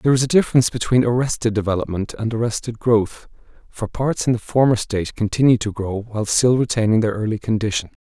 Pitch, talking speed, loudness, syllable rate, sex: 115 Hz, 185 wpm, -19 LUFS, 6.2 syllables/s, male